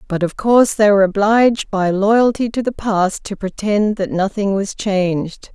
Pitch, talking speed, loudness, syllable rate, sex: 205 Hz, 185 wpm, -16 LUFS, 4.6 syllables/s, female